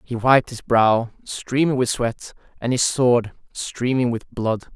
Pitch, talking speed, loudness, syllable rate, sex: 120 Hz, 165 wpm, -20 LUFS, 3.8 syllables/s, male